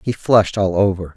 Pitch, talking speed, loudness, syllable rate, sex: 100 Hz, 205 wpm, -16 LUFS, 5.7 syllables/s, male